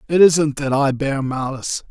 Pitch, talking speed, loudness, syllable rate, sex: 140 Hz, 190 wpm, -18 LUFS, 4.7 syllables/s, male